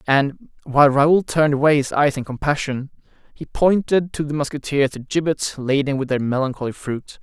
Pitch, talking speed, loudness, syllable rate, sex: 145 Hz, 175 wpm, -19 LUFS, 5.2 syllables/s, male